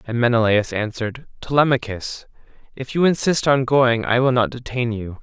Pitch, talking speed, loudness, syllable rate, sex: 125 Hz, 160 wpm, -19 LUFS, 5.2 syllables/s, male